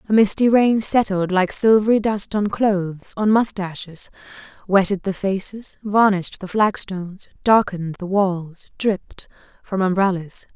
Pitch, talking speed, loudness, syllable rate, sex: 195 Hz, 130 wpm, -19 LUFS, 4.5 syllables/s, female